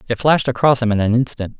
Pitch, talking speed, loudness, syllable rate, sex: 120 Hz, 265 wpm, -16 LUFS, 7.1 syllables/s, male